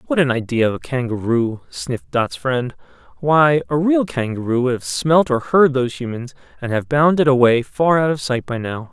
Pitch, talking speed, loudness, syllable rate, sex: 130 Hz, 200 wpm, -18 LUFS, 5.1 syllables/s, male